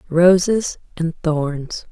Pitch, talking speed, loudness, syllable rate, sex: 170 Hz, 95 wpm, -18 LUFS, 2.6 syllables/s, female